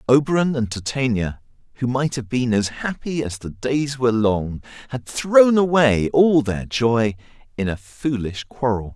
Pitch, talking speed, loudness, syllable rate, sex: 125 Hz, 160 wpm, -20 LUFS, 4.3 syllables/s, male